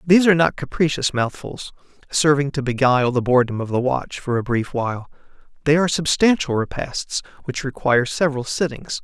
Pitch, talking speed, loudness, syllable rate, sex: 140 Hz, 165 wpm, -20 LUFS, 5.8 syllables/s, male